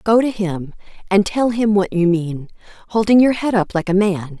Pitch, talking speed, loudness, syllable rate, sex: 195 Hz, 205 wpm, -17 LUFS, 4.9 syllables/s, female